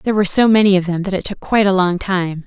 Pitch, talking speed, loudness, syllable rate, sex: 190 Hz, 315 wpm, -15 LUFS, 7.0 syllables/s, female